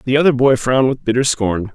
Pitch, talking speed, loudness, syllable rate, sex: 125 Hz, 240 wpm, -15 LUFS, 6.2 syllables/s, male